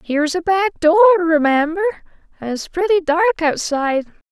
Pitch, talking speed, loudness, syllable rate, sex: 340 Hz, 140 wpm, -16 LUFS, 5.8 syllables/s, female